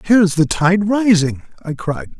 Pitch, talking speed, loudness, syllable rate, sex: 175 Hz, 190 wpm, -16 LUFS, 4.8 syllables/s, male